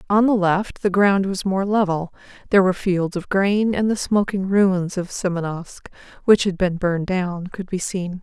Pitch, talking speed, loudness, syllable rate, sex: 190 Hz, 195 wpm, -20 LUFS, 4.7 syllables/s, female